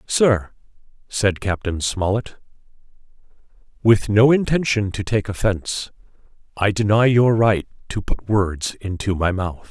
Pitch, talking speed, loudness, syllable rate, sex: 105 Hz, 125 wpm, -20 LUFS, 4.2 syllables/s, male